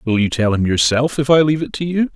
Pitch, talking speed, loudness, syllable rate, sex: 135 Hz, 280 wpm, -16 LUFS, 6.2 syllables/s, male